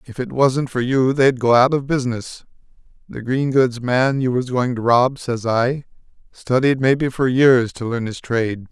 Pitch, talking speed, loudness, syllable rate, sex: 125 Hz, 200 wpm, -18 LUFS, 4.5 syllables/s, male